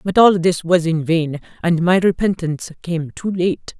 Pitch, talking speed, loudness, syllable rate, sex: 170 Hz, 190 wpm, -18 LUFS, 4.4 syllables/s, female